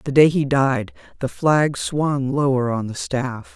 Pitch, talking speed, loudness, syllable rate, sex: 135 Hz, 185 wpm, -20 LUFS, 3.8 syllables/s, female